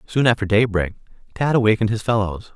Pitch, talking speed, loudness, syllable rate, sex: 110 Hz, 165 wpm, -19 LUFS, 6.3 syllables/s, male